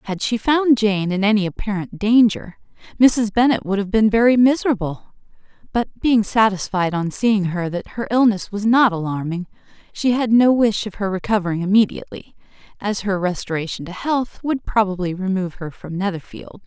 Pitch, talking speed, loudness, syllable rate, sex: 205 Hz, 165 wpm, -19 LUFS, 5.2 syllables/s, female